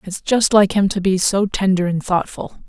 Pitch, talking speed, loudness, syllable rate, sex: 195 Hz, 225 wpm, -17 LUFS, 4.8 syllables/s, female